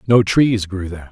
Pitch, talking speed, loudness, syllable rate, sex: 100 Hz, 215 wpm, -17 LUFS, 5.3 syllables/s, male